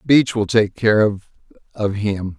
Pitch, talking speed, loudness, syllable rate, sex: 105 Hz, 150 wpm, -18 LUFS, 3.9 syllables/s, male